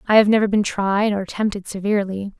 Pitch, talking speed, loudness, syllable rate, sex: 205 Hz, 200 wpm, -20 LUFS, 6.0 syllables/s, female